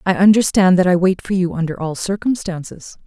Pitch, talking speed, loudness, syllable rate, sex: 185 Hz, 195 wpm, -16 LUFS, 5.6 syllables/s, female